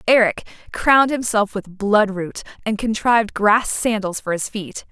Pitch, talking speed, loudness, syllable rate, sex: 215 Hz, 145 wpm, -19 LUFS, 4.5 syllables/s, female